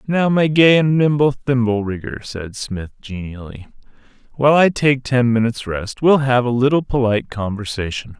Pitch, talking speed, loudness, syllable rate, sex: 125 Hz, 160 wpm, -17 LUFS, 5.0 syllables/s, male